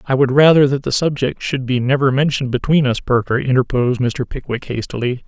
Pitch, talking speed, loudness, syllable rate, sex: 130 Hz, 195 wpm, -16 LUFS, 5.8 syllables/s, male